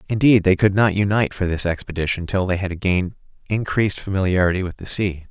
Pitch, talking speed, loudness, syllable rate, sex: 95 Hz, 190 wpm, -20 LUFS, 6.3 syllables/s, male